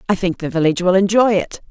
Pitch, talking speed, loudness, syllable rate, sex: 185 Hz, 245 wpm, -16 LUFS, 6.8 syllables/s, female